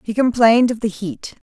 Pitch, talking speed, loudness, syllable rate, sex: 220 Hz, 200 wpm, -16 LUFS, 5.3 syllables/s, female